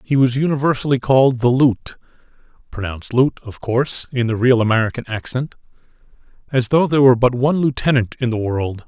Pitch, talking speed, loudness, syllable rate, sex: 125 Hz, 170 wpm, -17 LUFS, 4.1 syllables/s, male